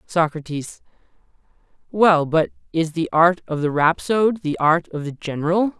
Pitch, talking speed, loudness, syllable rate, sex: 170 Hz, 145 wpm, -20 LUFS, 4.7 syllables/s, male